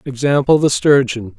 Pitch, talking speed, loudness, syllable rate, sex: 135 Hz, 130 wpm, -14 LUFS, 4.7 syllables/s, male